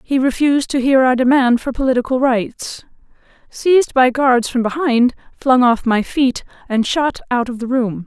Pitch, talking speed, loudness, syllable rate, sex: 255 Hz, 180 wpm, -16 LUFS, 4.7 syllables/s, female